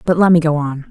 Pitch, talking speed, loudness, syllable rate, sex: 160 Hz, 335 wpm, -14 LUFS, 6.3 syllables/s, female